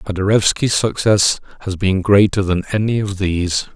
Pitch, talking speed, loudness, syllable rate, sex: 100 Hz, 160 wpm, -16 LUFS, 5.2 syllables/s, male